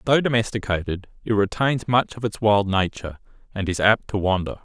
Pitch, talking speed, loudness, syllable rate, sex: 105 Hz, 180 wpm, -22 LUFS, 5.5 syllables/s, male